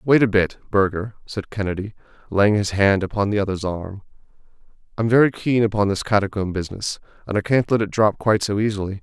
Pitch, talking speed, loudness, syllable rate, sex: 105 Hz, 200 wpm, -21 LUFS, 6.1 syllables/s, male